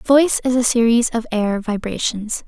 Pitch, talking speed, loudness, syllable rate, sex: 230 Hz, 170 wpm, -18 LUFS, 4.8 syllables/s, female